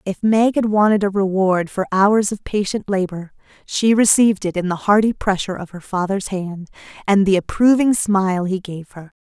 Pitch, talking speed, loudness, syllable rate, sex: 195 Hz, 190 wpm, -17 LUFS, 5.1 syllables/s, female